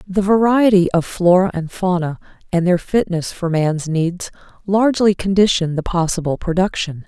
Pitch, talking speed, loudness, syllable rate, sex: 180 Hz, 145 wpm, -17 LUFS, 4.8 syllables/s, female